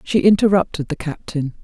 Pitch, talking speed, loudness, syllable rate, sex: 175 Hz, 145 wpm, -18 LUFS, 5.3 syllables/s, female